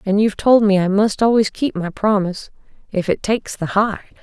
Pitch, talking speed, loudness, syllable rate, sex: 205 Hz, 215 wpm, -17 LUFS, 5.7 syllables/s, female